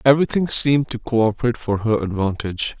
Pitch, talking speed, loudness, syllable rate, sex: 120 Hz, 150 wpm, -19 LUFS, 6.3 syllables/s, male